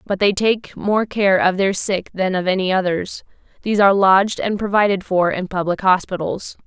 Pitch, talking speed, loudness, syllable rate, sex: 190 Hz, 190 wpm, -18 LUFS, 5.2 syllables/s, female